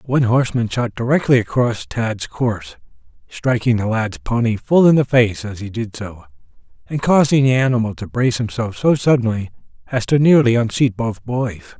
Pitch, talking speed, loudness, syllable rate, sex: 115 Hz, 175 wpm, -17 LUFS, 5.1 syllables/s, male